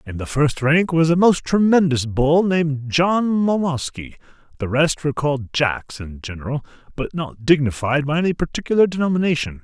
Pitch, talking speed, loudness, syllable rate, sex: 150 Hz, 160 wpm, -19 LUFS, 5.2 syllables/s, male